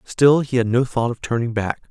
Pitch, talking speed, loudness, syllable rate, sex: 120 Hz, 250 wpm, -19 LUFS, 5.2 syllables/s, male